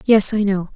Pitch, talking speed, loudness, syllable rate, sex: 200 Hz, 240 wpm, -17 LUFS, 4.9 syllables/s, female